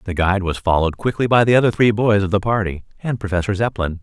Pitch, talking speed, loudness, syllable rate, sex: 100 Hz, 240 wpm, -18 LUFS, 6.7 syllables/s, male